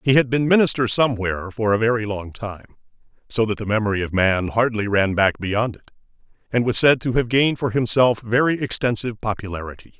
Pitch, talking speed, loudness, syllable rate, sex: 115 Hz, 190 wpm, -20 LUFS, 6.0 syllables/s, male